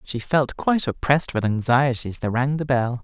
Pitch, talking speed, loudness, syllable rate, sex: 130 Hz, 215 wpm, -21 LUFS, 5.5 syllables/s, male